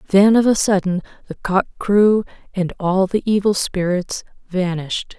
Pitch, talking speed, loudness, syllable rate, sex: 190 Hz, 150 wpm, -18 LUFS, 4.5 syllables/s, female